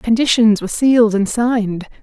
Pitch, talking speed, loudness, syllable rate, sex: 225 Hz, 150 wpm, -15 LUFS, 5.4 syllables/s, female